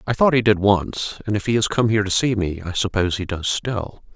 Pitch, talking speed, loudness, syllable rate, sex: 105 Hz, 275 wpm, -20 LUFS, 5.8 syllables/s, male